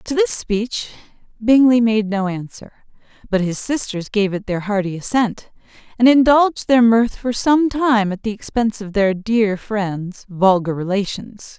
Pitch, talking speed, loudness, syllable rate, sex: 215 Hz, 160 wpm, -18 LUFS, 4.3 syllables/s, female